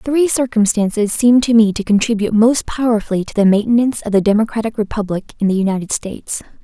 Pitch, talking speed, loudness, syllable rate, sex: 220 Hz, 180 wpm, -15 LUFS, 6.3 syllables/s, female